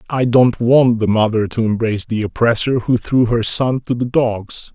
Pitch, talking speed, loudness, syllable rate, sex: 115 Hz, 200 wpm, -16 LUFS, 4.6 syllables/s, male